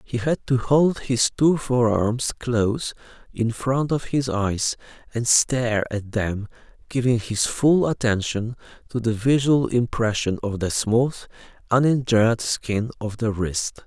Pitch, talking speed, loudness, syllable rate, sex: 120 Hz, 145 wpm, -22 LUFS, 3.9 syllables/s, male